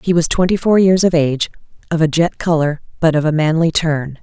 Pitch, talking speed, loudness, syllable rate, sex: 160 Hz, 225 wpm, -15 LUFS, 5.7 syllables/s, female